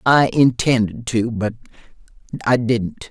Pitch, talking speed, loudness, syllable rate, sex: 115 Hz, 95 wpm, -18 LUFS, 3.9 syllables/s, male